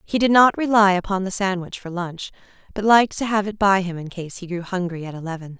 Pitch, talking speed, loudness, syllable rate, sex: 190 Hz, 245 wpm, -20 LUFS, 5.7 syllables/s, female